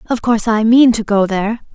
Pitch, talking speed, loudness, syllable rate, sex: 220 Hz, 240 wpm, -13 LUFS, 6.1 syllables/s, female